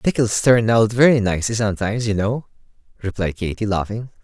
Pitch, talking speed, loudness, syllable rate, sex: 105 Hz, 155 wpm, -19 LUFS, 5.4 syllables/s, male